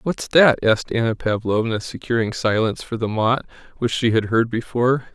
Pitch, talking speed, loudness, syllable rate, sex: 115 Hz, 175 wpm, -20 LUFS, 5.4 syllables/s, male